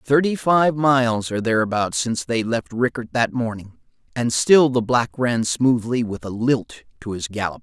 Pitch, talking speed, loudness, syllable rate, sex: 115 Hz, 180 wpm, -20 LUFS, 4.6 syllables/s, male